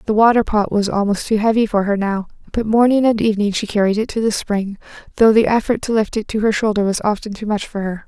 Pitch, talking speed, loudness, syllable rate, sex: 210 Hz, 260 wpm, -17 LUFS, 6.2 syllables/s, female